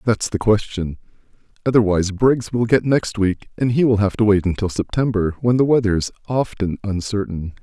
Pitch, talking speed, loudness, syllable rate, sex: 105 Hz, 175 wpm, -19 LUFS, 5.3 syllables/s, male